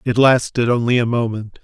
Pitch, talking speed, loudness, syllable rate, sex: 120 Hz, 185 wpm, -17 LUFS, 5.2 syllables/s, male